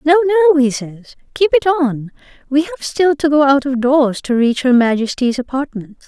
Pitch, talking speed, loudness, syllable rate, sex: 280 Hz, 200 wpm, -15 LUFS, 5.0 syllables/s, female